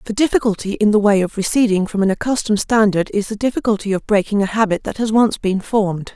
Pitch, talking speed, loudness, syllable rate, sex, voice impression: 210 Hz, 225 wpm, -17 LUFS, 6.3 syllables/s, female, very feminine, very adult-like, slightly middle-aged, very thin, slightly relaxed, slightly weak, slightly dark, very hard, very clear, very fluent, slightly raspy, slightly cute, intellectual, refreshing, very sincere, slightly calm, slightly friendly, slightly reassuring, very unique, slightly elegant, slightly wild, slightly sweet, slightly lively, very strict, slightly intense, very sharp, light